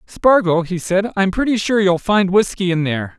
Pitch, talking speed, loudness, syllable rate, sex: 190 Hz, 205 wpm, -16 LUFS, 5.0 syllables/s, male